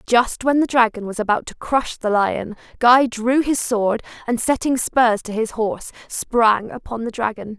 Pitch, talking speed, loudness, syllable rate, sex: 235 Hz, 190 wpm, -19 LUFS, 4.4 syllables/s, female